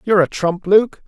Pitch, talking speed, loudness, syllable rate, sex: 190 Hz, 225 wpm, -16 LUFS, 5.2 syllables/s, male